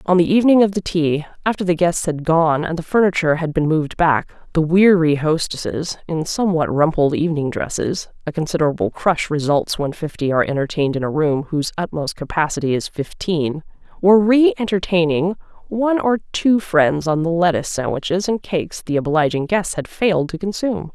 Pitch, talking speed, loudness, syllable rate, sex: 165 Hz, 175 wpm, -18 LUFS, 4.2 syllables/s, female